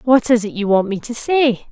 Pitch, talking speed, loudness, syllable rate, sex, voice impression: 235 Hz, 280 wpm, -17 LUFS, 5.0 syllables/s, female, feminine, adult-like, slightly tensed, slightly bright, clear, intellectual, calm, friendly, reassuring, lively, slightly kind